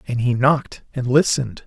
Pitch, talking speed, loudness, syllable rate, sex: 130 Hz, 180 wpm, -19 LUFS, 5.5 syllables/s, male